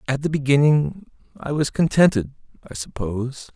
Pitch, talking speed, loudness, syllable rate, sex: 140 Hz, 135 wpm, -21 LUFS, 5.1 syllables/s, male